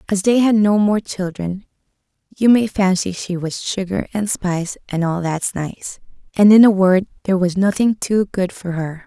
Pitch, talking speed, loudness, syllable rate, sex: 190 Hz, 190 wpm, -17 LUFS, 4.7 syllables/s, female